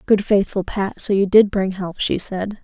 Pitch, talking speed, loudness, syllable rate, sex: 195 Hz, 230 wpm, -19 LUFS, 4.5 syllables/s, female